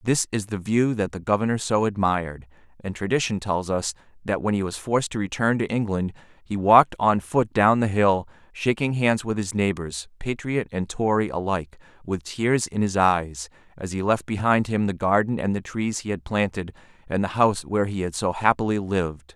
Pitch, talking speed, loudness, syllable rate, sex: 100 Hz, 200 wpm, -23 LUFS, 5.2 syllables/s, male